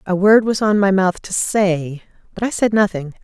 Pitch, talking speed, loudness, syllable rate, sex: 195 Hz, 220 wpm, -16 LUFS, 4.8 syllables/s, female